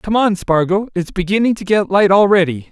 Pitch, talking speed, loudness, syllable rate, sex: 195 Hz, 200 wpm, -15 LUFS, 5.4 syllables/s, male